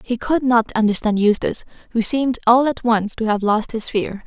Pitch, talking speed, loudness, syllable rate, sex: 230 Hz, 210 wpm, -18 LUFS, 5.3 syllables/s, female